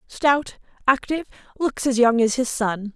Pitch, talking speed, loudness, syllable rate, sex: 250 Hz, 140 wpm, -21 LUFS, 4.5 syllables/s, female